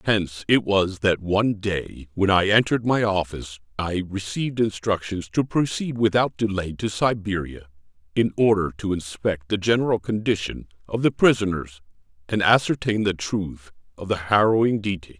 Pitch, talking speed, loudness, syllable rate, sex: 100 Hz, 150 wpm, -22 LUFS, 5.0 syllables/s, male